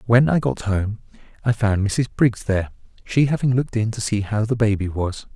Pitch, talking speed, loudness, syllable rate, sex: 110 Hz, 215 wpm, -21 LUFS, 5.4 syllables/s, male